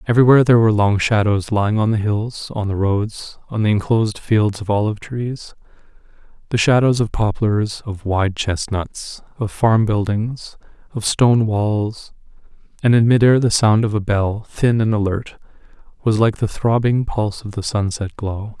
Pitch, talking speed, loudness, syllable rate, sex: 110 Hz, 170 wpm, -18 LUFS, 4.8 syllables/s, male